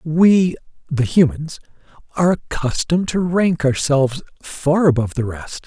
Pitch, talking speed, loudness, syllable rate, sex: 155 Hz, 125 wpm, -18 LUFS, 4.7 syllables/s, male